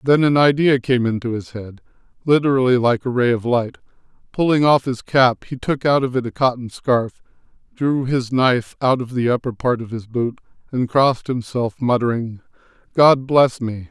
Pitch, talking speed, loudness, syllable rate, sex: 125 Hz, 185 wpm, -18 LUFS, 4.9 syllables/s, male